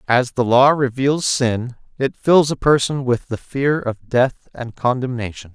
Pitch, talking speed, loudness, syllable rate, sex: 125 Hz, 175 wpm, -18 LUFS, 4.1 syllables/s, male